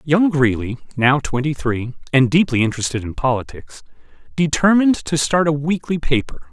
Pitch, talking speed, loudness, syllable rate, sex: 145 Hz, 145 wpm, -18 LUFS, 5.3 syllables/s, male